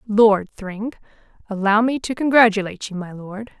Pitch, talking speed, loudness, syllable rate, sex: 210 Hz, 135 wpm, -19 LUFS, 4.9 syllables/s, female